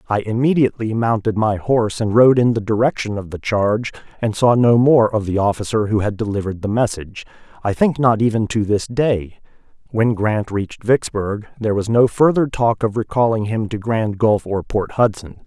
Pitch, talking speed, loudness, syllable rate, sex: 110 Hz, 195 wpm, -18 LUFS, 5.4 syllables/s, male